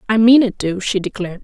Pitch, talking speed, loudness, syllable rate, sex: 205 Hz, 250 wpm, -15 LUFS, 6.4 syllables/s, female